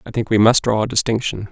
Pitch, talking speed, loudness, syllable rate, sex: 110 Hz, 275 wpm, -17 LUFS, 6.6 syllables/s, male